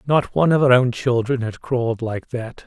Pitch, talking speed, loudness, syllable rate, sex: 125 Hz, 225 wpm, -19 LUFS, 5.1 syllables/s, male